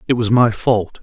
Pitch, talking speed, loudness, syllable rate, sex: 115 Hz, 235 wpm, -16 LUFS, 4.8 syllables/s, male